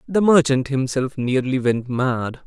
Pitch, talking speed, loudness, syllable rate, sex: 135 Hz, 145 wpm, -20 LUFS, 4.1 syllables/s, male